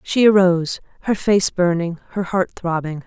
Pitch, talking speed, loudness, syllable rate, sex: 180 Hz, 155 wpm, -19 LUFS, 4.7 syllables/s, female